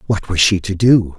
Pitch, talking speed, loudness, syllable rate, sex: 95 Hz, 255 wpm, -14 LUFS, 4.9 syllables/s, male